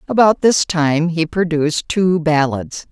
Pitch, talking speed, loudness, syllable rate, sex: 170 Hz, 145 wpm, -16 LUFS, 4.0 syllables/s, female